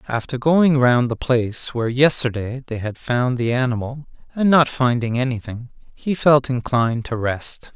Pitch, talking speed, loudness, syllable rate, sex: 125 Hz, 165 wpm, -19 LUFS, 4.7 syllables/s, male